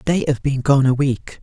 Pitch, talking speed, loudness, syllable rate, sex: 135 Hz, 255 wpm, -18 LUFS, 4.8 syllables/s, male